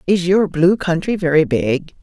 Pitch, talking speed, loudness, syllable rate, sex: 170 Hz, 180 wpm, -16 LUFS, 4.4 syllables/s, female